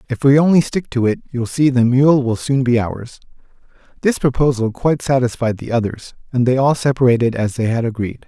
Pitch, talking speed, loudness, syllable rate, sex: 125 Hz, 205 wpm, -16 LUFS, 5.6 syllables/s, male